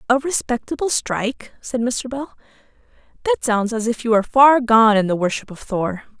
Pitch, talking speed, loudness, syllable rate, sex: 230 Hz, 185 wpm, -19 LUFS, 5.1 syllables/s, female